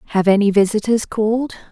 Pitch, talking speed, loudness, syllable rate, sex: 215 Hz, 140 wpm, -17 LUFS, 6.4 syllables/s, female